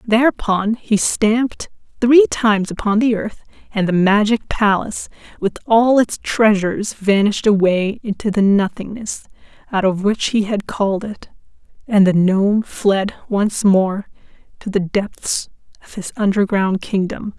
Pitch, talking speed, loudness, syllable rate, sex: 205 Hz, 140 wpm, -17 LUFS, 4.4 syllables/s, female